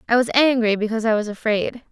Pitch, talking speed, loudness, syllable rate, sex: 230 Hz, 220 wpm, -19 LUFS, 6.4 syllables/s, female